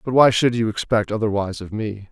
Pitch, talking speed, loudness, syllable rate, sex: 110 Hz, 225 wpm, -20 LUFS, 6.0 syllables/s, male